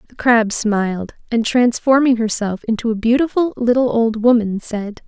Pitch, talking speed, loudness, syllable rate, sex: 230 Hz, 155 wpm, -17 LUFS, 4.7 syllables/s, female